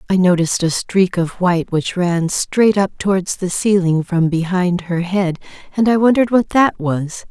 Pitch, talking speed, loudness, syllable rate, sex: 185 Hz, 190 wpm, -16 LUFS, 4.6 syllables/s, female